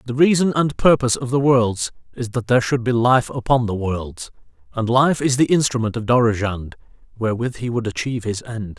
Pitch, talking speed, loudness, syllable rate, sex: 120 Hz, 200 wpm, -19 LUFS, 5.6 syllables/s, male